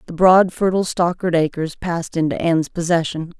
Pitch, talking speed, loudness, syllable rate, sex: 170 Hz, 160 wpm, -18 LUFS, 5.7 syllables/s, female